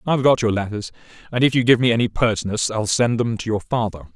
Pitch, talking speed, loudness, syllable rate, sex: 115 Hz, 245 wpm, -20 LUFS, 6.3 syllables/s, male